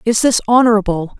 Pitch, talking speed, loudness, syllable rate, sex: 215 Hz, 150 wpm, -13 LUFS, 5.9 syllables/s, female